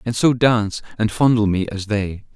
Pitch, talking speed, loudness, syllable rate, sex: 110 Hz, 205 wpm, -19 LUFS, 5.0 syllables/s, male